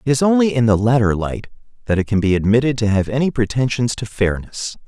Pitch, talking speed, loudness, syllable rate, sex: 115 Hz, 220 wpm, -18 LUFS, 6.1 syllables/s, male